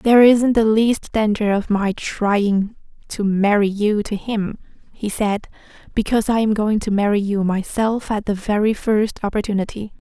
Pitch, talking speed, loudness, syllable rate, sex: 210 Hz, 165 wpm, -19 LUFS, 4.5 syllables/s, female